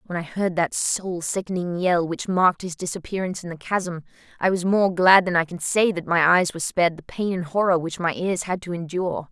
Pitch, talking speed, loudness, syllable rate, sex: 175 Hz, 240 wpm, -22 LUFS, 5.5 syllables/s, female